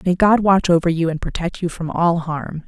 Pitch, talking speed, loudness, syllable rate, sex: 170 Hz, 245 wpm, -18 LUFS, 5.1 syllables/s, female